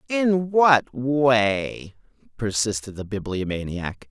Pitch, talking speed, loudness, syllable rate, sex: 120 Hz, 90 wpm, -22 LUFS, 3.1 syllables/s, male